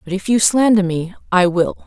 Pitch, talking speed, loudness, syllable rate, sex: 195 Hz, 225 wpm, -16 LUFS, 5.0 syllables/s, female